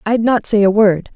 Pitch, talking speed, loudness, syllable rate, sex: 210 Hz, 260 wpm, -13 LUFS, 4.9 syllables/s, female